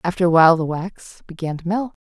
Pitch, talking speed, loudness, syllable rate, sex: 175 Hz, 235 wpm, -18 LUFS, 6.0 syllables/s, female